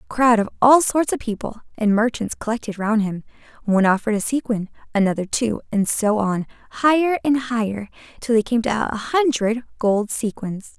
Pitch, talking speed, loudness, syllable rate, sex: 225 Hz, 180 wpm, -20 LUFS, 5.3 syllables/s, female